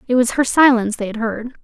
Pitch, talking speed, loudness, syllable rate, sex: 235 Hz, 255 wpm, -16 LUFS, 6.5 syllables/s, female